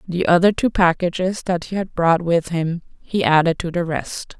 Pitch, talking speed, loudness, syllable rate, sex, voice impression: 175 Hz, 205 wpm, -19 LUFS, 4.7 syllables/s, female, feminine, slightly adult-like, intellectual, calm, slightly sweet